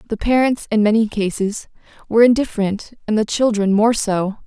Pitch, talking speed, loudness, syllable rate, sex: 215 Hz, 160 wpm, -17 LUFS, 5.4 syllables/s, female